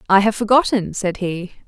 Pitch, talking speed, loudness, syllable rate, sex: 205 Hz, 180 wpm, -18 LUFS, 5.0 syllables/s, female